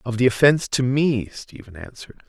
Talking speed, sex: 185 wpm, male